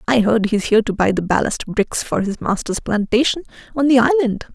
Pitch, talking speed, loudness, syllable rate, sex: 230 Hz, 210 wpm, -18 LUFS, 5.5 syllables/s, female